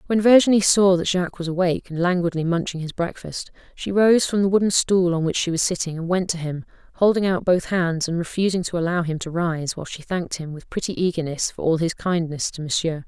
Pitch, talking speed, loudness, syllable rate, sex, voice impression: 175 Hz, 235 wpm, -21 LUFS, 5.9 syllables/s, female, feminine, adult-like, tensed, powerful, intellectual, calm, elegant, lively, slightly sharp